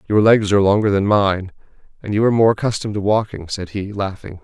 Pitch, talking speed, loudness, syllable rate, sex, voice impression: 100 Hz, 215 wpm, -17 LUFS, 6.4 syllables/s, male, very masculine, very adult-like, slightly thick, cool, sincere, slightly reassuring